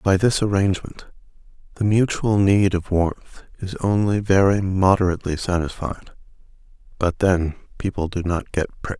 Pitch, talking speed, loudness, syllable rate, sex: 95 Hz, 135 wpm, -21 LUFS, 4.8 syllables/s, male